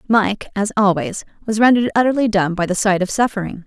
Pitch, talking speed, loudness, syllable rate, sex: 205 Hz, 195 wpm, -17 LUFS, 6.1 syllables/s, female